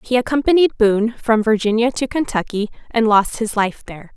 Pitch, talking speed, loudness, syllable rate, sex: 225 Hz, 175 wpm, -17 LUFS, 5.5 syllables/s, female